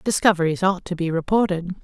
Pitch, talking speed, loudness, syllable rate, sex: 180 Hz, 165 wpm, -21 LUFS, 6.0 syllables/s, female